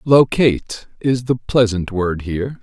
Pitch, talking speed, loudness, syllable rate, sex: 110 Hz, 135 wpm, -18 LUFS, 4.3 syllables/s, male